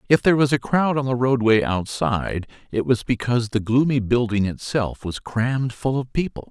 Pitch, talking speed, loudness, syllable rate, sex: 120 Hz, 195 wpm, -21 LUFS, 5.3 syllables/s, male